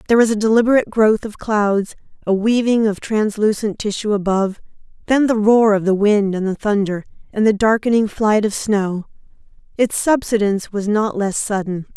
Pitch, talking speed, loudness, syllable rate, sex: 210 Hz, 170 wpm, -17 LUFS, 5.2 syllables/s, female